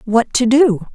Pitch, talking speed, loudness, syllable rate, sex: 235 Hz, 190 wpm, -14 LUFS, 3.9 syllables/s, female